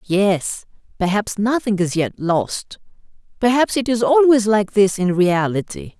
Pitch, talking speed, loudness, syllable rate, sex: 210 Hz, 140 wpm, -18 LUFS, 4.1 syllables/s, female